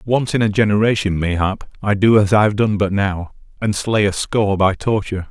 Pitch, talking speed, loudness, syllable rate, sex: 100 Hz, 215 wpm, -17 LUFS, 5.4 syllables/s, male